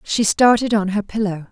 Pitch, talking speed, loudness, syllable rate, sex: 205 Hz, 200 wpm, -17 LUFS, 5.0 syllables/s, female